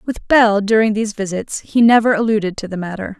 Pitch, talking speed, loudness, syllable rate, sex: 215 Hz, 205 wpm, -16 LUFS, 5.8 syllables/s, female